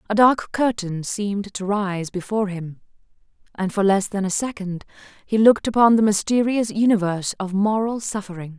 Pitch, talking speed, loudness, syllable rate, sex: 205 Hz, 160 wpm, -21 LUFS, 5.2 syllables/s, female